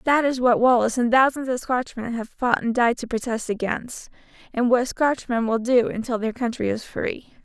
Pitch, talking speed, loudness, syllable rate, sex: 240 Hz, 200 wpm, -22 LUFS, 5.0 syllables/s, female